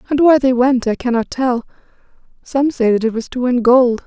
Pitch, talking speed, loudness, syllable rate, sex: 250 Hz, 220 wpm, -15 LUFS, 5.2 syllables/s, female